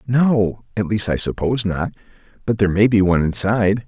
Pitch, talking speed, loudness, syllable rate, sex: 105 Hz, 185 wpm, -18 LUFS, 5.8 syllables/s, male